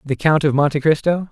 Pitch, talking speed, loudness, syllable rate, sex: 150 Hz, 230 wpm, -17 LUFS, 5.8 syllables/s, male